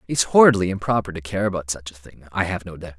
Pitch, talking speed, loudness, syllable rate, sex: 95 Hz, 260 wpm, -21 LUFS, 6.5 syllables/s, male